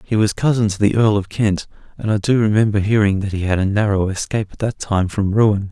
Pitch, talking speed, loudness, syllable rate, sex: 105 Hz, 250 wpm, -18 LUFS, 5.8 syllables/s, male